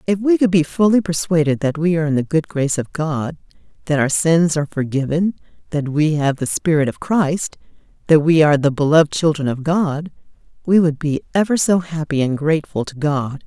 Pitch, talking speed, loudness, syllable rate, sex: 160 Hz, 200 wpm, -18 LUFS, 5.5 syllables/s, female